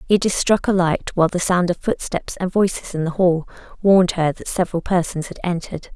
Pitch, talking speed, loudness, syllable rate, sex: 180 Hz, 210 wpm, -19 LUFS, 5.8 syllables/s, female